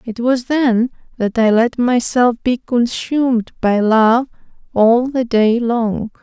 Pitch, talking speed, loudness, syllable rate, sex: 235 Hz, 145 wpm, -15 LUFS, 3.5 syllables/s, female